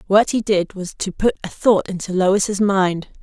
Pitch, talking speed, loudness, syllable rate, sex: 195 Hz, 205 wpm, -19 LUFS, 4.2 syllables/s, female